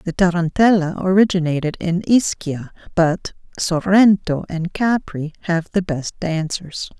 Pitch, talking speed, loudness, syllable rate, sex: 175 Hz, 110 wpm, -19 LUFS, 4.1 syllables/s, female